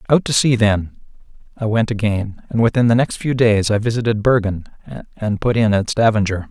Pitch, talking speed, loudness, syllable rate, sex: 110 Hz, 195 wpm, -17 LUFS, 5.2 syllables/s, male